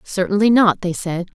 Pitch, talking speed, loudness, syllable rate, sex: 190 Hz, 175 wpm, -17 LUFS, 4.9 syllables/s, female